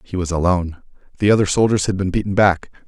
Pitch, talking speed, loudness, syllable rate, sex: 95 Hz, 210 wpm, -18 LUFS, 6.6 syllables/s, male